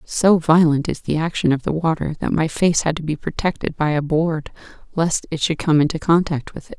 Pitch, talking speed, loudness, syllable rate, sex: 160 Hz, 230 wpm, -19 LUFS, 5.4 syllables/s, female